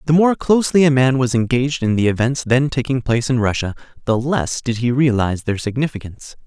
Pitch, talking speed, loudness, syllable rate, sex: 130 Hz, 205 wpm, -17 LUFS, 6.1 syllables/s, male